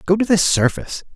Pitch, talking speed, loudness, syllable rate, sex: 185 Hz, 210 wpm, -16 LUFS, 6.4 syllables/s, male